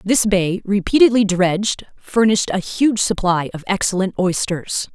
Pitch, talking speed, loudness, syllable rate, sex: 195 Hz, 135 wpm, -17 LUFS, 4.6 syllables/s, female